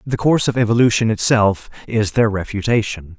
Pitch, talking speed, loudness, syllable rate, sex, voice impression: 110 Hz, 150 wpm, -17 LUFS, 5.5 syllables/s, male, very masculine, slightly middle-aged, thick, tensed, powerful, bright, slightly soft, very clear, fluent, slightly raspy, cool, very intellectual, refreshing, very sincere, calm, very friendly, very reassuring, unique, elegant, slightly wild, sweet, lively, kind, slightly intense